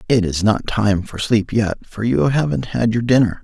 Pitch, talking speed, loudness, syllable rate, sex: 110 Hz, 225 wpm, -18 LUFS, 4.6 syllables/s, male